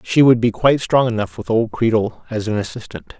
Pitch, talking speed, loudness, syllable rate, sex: 115 Hz, 225 wpm, -17 LUFS, 5.7 syllables/s, male